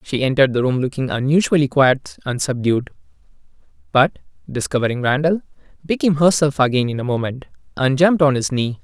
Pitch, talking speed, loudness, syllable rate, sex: 140 Hz, 150 wpm, -18 LUFS, 6.0 syllables/s, male